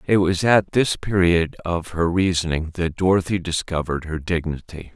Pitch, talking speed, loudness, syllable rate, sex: 85 Hz, 155 wpm, -21 LUFS, 4.8 syllables/s, male